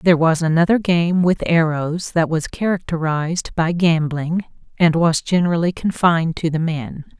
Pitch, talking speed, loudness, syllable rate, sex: 165 Hz, 150 wpm, -18 LUFS, 4.8 syllables/s, female